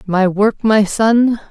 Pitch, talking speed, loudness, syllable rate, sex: 210 Hz, 160 wpm, -14 LUFS, 3.1 syllables/s, female